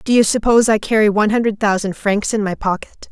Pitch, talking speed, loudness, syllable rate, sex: 210 Hz, 230 wpm, -16 LUFS, 6.3 syllables/s, female